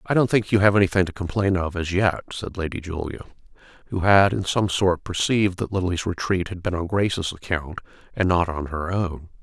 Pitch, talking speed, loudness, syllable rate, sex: 90 Hz, 210 wpm, -22 LUFS, 5.5 syllables/s, male